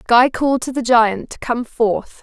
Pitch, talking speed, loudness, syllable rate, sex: 240 Hz, 215 wpm, -17 LUFS, 4.4 syllables/s, female